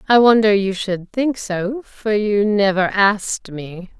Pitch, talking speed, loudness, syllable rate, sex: 205 Hz, 165 wpm, -17 LUFS, 3.7 syllables/s, female